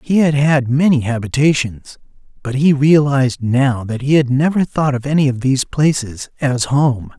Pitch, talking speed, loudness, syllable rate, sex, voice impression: 135 Hz, 175 wpm, -15 LUFS, 4.8 syllables/s, male, masculine, adult-like, fluent, refreshing, slightly unique